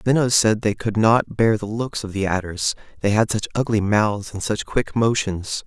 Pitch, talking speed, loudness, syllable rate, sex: 105 Hz, 210 wpm, -21 LUFS, 4.8 syllables/s, male